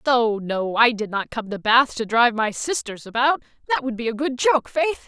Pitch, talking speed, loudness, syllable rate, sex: 240 Hz, 235 wpm, -21 LUFS, 5.0 syllables/s, female